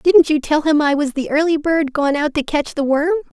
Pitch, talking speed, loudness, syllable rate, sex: 305 Hz, 265 wpm, -17 LUFS, 5.2 syllables/s, female